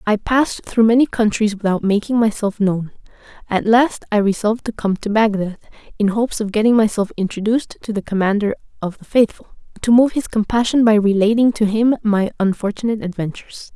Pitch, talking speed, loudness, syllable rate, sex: 215 Hz, 175 wpm, -17 LUFS, 5.8 syllables/s, female